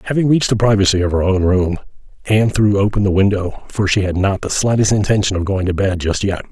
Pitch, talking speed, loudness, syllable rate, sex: 100 Hz, 240 wpm, -16 LUFS, 6.2 syllables/s, male